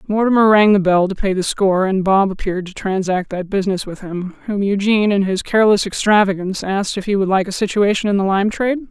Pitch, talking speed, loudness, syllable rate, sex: 200 Hz, 230 wpm, -17 LUFS, 6.3 syllables/s, female